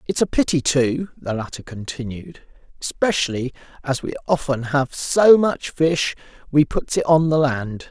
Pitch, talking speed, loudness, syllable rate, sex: 140 Hz, 160 wpm, -20 LUFS, 4.3 syllables/s, male